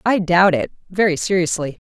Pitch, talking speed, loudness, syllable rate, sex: 180 Hz, 160 wpm, -18 LUFS, 5.2 syllables/s, female